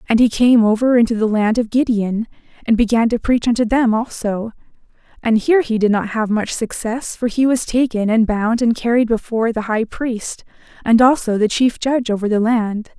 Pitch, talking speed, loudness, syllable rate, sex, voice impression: 230 Hz, 205 wpm, -17 LUFS, 5.2 syllables/s, female, feminine, slightly adult-like, soft, slightly calm, friendly, slightly reassuring, kind